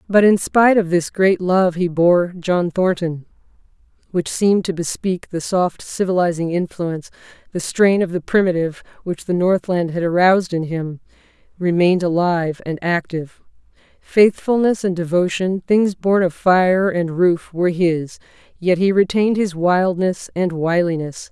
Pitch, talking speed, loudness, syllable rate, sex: 180 Hz, 150 wpm, -18 LUFS, 4.7 syllables/s, female